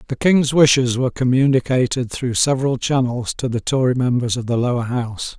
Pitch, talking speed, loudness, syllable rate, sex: 125 Hz, 180 wpm, -18 LUFS, 5.7 syllables/s, male